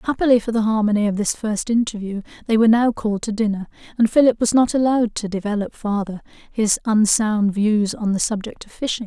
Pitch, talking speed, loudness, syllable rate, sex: 220 Hz, 200 wpm, -19 LUFS, 5.9 syllables/s, female